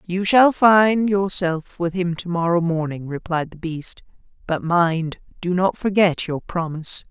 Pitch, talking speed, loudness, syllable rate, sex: 175 Hz, 160 wpm, -20 LUFS, 4.1 syllables/s, female